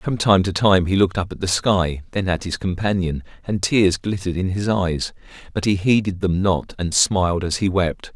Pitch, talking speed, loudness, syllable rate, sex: 95 Hz, 220 wpm, -20 LUFS, 5.0 syllables/s, male